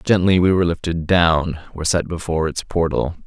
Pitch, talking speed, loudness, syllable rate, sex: 85 Hz, 185 wpm, -19 LUFS, 5.8 syllables/s, male